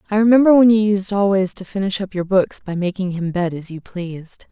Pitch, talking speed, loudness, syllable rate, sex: 190 Hz, 240 wpm, -17 LUFS, 5.7 syllables/s, female